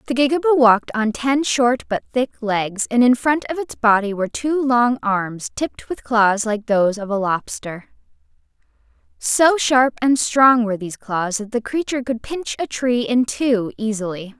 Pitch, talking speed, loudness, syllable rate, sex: 240 Hz, 185 wpm, -19 LUFS, 4.6 syllables/s, female